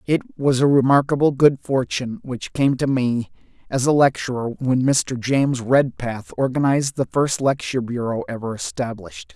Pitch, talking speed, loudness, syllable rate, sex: 130 Hz, 155 wpm, -20 LUFS, 4.9 syllables/s, male